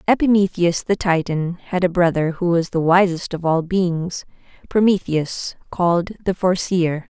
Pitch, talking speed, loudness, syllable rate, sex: 175 Hz, 135 wpm, -19 LUFS, 4.5 syllables/s, female